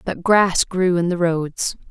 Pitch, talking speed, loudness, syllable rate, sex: 175 Hz, 190 wpm, -18 LUFS, 3.5 syllables/s, female